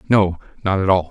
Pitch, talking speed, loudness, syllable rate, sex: 95 Hz, 215 wpm, -19 LUFS, 6.0 syllables/s, male